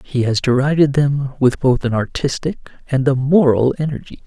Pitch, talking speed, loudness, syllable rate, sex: 135 Hz, 170 wpm, -17 LUFS, 4.9 syllables/s, male